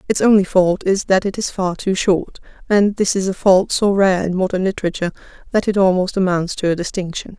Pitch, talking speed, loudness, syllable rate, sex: 190 Hz, 220 wpm, -17 LUFS, 5.7 syllables/s, female